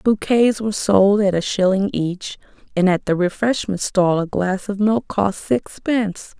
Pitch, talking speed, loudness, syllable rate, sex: 200 Hz, 170 wpm, -19 LUFS, 4.3 syllables/s, female